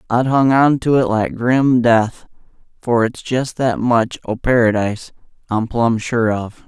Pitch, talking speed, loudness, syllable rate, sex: 120 Hz, 170 wpm, -16 LUFS, 4.2 syllables/s, male